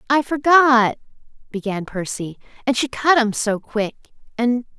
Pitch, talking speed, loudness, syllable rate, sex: 240 Hz, 125 wpm, -19 LUFS, 4.3 syllables/s, female